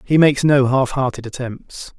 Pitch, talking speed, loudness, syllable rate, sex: 130 Hz, 180 wpm, -17 LUFS, 4.9 syllables/s, male